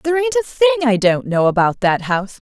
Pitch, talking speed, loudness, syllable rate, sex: 200 Hz, 235 wpm, -16 LUFS, 6.4 syllables/s, female